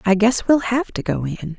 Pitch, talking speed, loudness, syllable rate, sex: 215 Hz, 265 wpm, -19 LUFS, 4.7 syllables/s, female